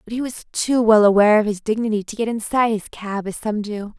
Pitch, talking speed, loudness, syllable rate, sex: 215 Hz, 255 wpm, -19 LUFS, 6.2 syllables/s, female